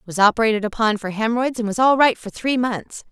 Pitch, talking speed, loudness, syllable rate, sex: 225 Hz, 230 wpm, -19 LUFS, 6.1 syllables/s, female